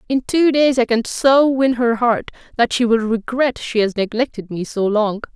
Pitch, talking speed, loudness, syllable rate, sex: 235 Hz, 215 wpm, -17 LUFS, 4.6 syllables/s, female